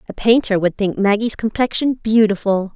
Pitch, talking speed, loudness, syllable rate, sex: 215 Hz, 150 wpm, -17 LUFS, 5.1 syllables/s, female